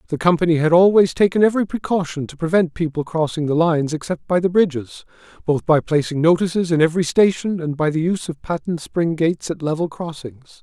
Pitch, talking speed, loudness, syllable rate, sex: 165 Hz, 200 wpm, -19 LUFS, 6.0 syllables/s, male